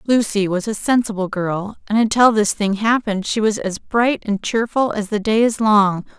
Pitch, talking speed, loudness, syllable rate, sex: 215 Hz, 205 wpm, -18 LUFS, 4.8 syllables/s, female